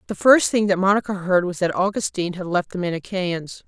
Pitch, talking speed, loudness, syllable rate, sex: 185 Hz, 215 wpm, -20 LUFS, 5.8 syllables/s, female